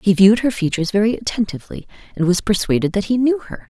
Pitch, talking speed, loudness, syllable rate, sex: 205 Hz, 205 wpm, -18 LUFS, 6.9 syllables/s, female